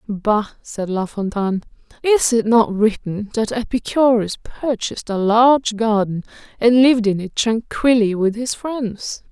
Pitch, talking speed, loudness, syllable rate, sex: 220 Hz, 140 wpm, -18 LUFS, 4.3 syllables/s, female